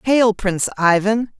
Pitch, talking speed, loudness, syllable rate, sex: 210 Hz, 130 wpm, -17 LUFS, 4.2 syllables/s, female